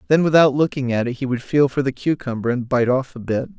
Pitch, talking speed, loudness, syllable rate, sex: 135 Hz, 270 wpm, -19 LUFS, 6.0 syllables/s, male